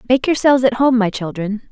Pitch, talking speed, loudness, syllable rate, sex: 235 Hz, 210 wpm, -16 LUFS, 6.1 syllables/s, female